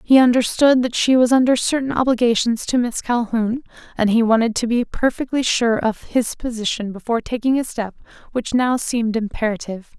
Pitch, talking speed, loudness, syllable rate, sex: 235 Hz, 175 wpm, -19 LUFS, 5.5 syllables/s, female